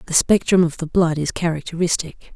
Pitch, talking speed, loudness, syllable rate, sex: 170 Hz, 180 wpm, -19 LUFS, 5.5 syllables/s, female